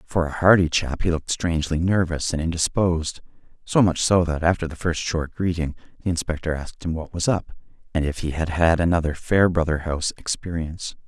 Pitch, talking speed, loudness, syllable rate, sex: 85 Hz, 190 wpm, -23 LUFS, 5.7 syllables/s, male